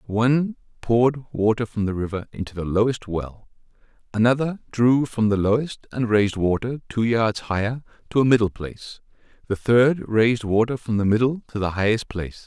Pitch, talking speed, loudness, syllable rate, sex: 115 Hz, 175 wpm, -22 LUFS, 5.4 syllables/s, male